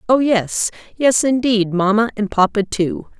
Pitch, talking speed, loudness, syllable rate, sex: 220 Hz, 150 wpm, -17 LUFS, 4.2 syllables/s, female